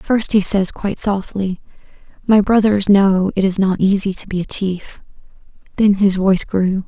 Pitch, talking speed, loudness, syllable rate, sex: 195 Hz, 175 wpm, -16 LUFS, 4.6 syllables/s, female